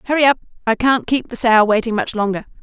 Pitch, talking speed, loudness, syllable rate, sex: 230 Hz, 230 wpm, -17 LUFS, 6.4 syllables/s, female